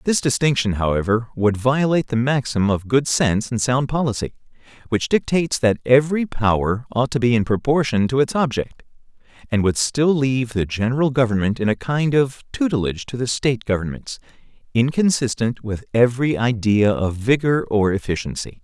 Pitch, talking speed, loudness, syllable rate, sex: 125 Hz, 160 wpm, -20 LUFS, 5.4 syllables/s, male